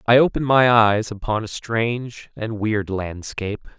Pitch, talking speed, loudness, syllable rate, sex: 110 Hz, 160 wpm, -20 LUFS, 4.6 syllables/s, male